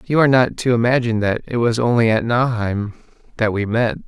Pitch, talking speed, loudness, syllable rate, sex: 115 Hz, 205 wpm, -18 LUFS, 5.9 syllables/s, male